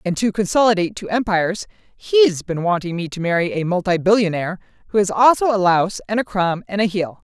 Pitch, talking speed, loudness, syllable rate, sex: 195 Hz, 195 wpm, -18 LUFS, 6.1 syllables/s, female